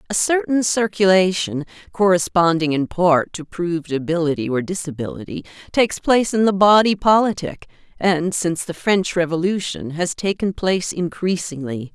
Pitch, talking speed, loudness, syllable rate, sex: 175 Hz, 130 wpm, -19 LUFS, 5.1 syllables/s, female